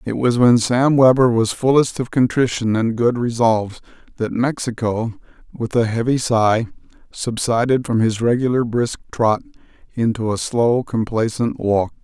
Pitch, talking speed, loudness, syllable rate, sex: 115 Hz, 145 wpm, -18 LUFS, 4.5 syllables/s, male